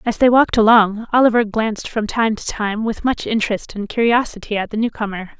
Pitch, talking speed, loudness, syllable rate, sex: 220 Hz, 210 wpm, -17 LUFS, 5.8 syllables/s, female